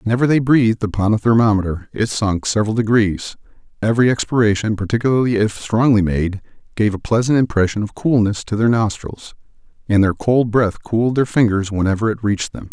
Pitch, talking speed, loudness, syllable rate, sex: 110 Hz, 170 wpm, -17 LUFS, 5.9 syllables/s, male